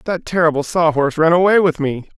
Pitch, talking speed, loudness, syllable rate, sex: 165 Hz, 220 wpm, -15 LUFS, 5.7 syllables/s, male